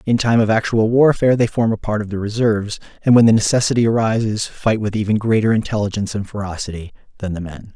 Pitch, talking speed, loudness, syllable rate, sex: 110 Hz, 210 wpm, -17 LUFS, 6.5 syllables/s, male